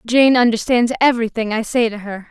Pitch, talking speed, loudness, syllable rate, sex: 230 Hz, 185 wpm, -16 LUFS, 5.8 syllables/s, female